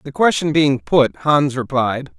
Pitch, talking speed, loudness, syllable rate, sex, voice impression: 140 Hz, 165 wpm, -17 LUFS, 4.0 syllables/s, male, very masculine, slightly young, adult-like, slightly thick, slightly tensed, slightly powerful, bright, very hard, clear, fluent, cool, slightly intellectual, very refreshing, very sincere, slightly calm, friendly, very reassuring, slightly unique, wild, sweet, very lively, very kind